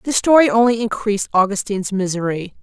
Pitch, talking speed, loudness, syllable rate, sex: 210 Hz, 135 wpm, -17 LUFS, 6.2 syllables/s, female